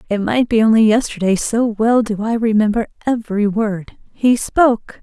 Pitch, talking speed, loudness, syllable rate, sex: 220 Hz, 165 wpm, -16 LUFS, 4.9 syllables/s, female